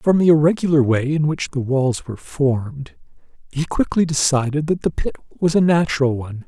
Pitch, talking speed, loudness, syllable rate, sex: 145 Hz, 185 wpm, -19 LUFS, 5.4 syllables/s, male